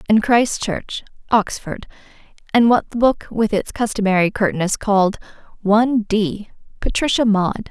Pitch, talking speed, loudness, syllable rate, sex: 210 Hz, 130 wpm, -18 LUFS, 5.1 syllables/s, female